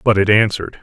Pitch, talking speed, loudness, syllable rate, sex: 105 Hz, 215 wpm, -14 LUFS, 6.9 syllables/s, male